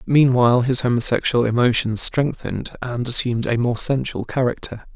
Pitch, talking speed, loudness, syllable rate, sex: 120 Hz, 135 wpm, -19 LUFS, 5.3 syllables/s, male